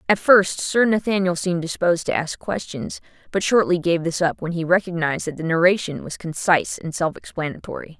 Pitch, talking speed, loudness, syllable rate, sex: 175 Hz, 190 wpm, -21 LUFS, 5.7 syllables/s, female